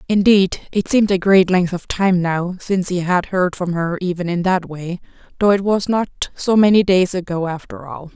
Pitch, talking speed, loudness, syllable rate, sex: 185 Hz, 215 wpm, -17 LUFS, 4.8 syllables/s, female